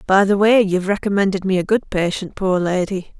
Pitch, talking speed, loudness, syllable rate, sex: 190 Hz, 205 wpm, -18 LUFS, 5.6 syllables/s, female